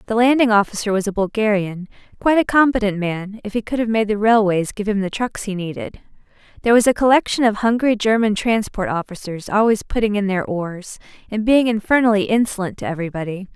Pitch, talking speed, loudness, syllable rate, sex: 210 Hz, 190 wpm, -18 LUFS, 6.0 syllables/s, female